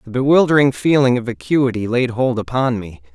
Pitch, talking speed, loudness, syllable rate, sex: 120 Hz, 170 wpm, -16 LUFS, 5.5 syllables/s, male